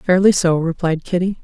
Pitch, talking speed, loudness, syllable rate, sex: 175 Hz, 165 wpm, -17 LUFS, 5.1 syllables/s, female